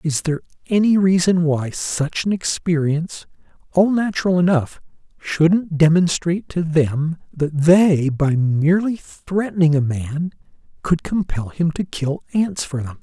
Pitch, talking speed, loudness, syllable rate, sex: 165 Hz, 130 wpm, -19 LUFS, 4.2 syllables/s, male